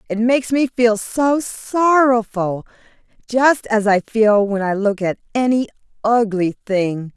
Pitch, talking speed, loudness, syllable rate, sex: 225 Hz, 135 wpm, -17 LUFS, 3.9 syllables/s, female